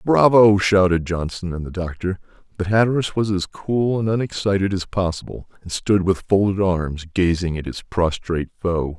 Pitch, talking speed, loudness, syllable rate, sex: 95 Hz, 165 wpm, -20 LUFS, 4.9 syllables/s, male